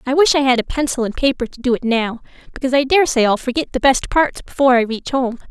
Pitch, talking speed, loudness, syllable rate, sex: 260 Hz, 260 wpm, -17 LUFS, 6.6 syllables/s, female